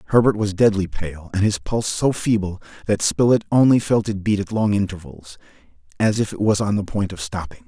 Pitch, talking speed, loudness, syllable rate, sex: 100 Hz, 210 wpm, -20 LUFS, 5.6 syllables/s, male